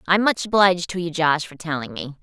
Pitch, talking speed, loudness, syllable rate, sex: 170 Hz, 240 wpm, -21 LUFS, 5.9 syllables/s, female